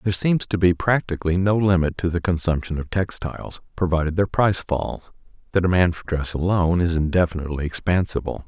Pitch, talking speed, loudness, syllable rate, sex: 90 Hz, 170 wpm, -22 LUFS, 6.0 syllables/s, male